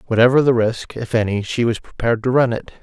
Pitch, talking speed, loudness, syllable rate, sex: 120 Hz, 235 wpm, -18 LUFS, 6.2 syllables/s, male